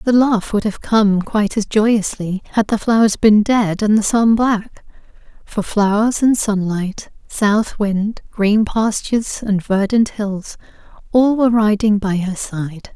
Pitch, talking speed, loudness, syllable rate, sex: 210 Hz, 155 wpm, -16 LUFS, 3.9 syllables/s, female